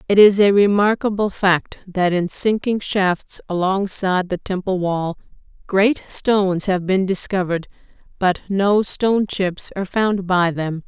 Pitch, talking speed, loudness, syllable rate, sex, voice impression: 190 Hz, 145 wpm, -19 LUFS, 4.3 syllables/s, female, feminine, very adult-like, slightly intellectual, calm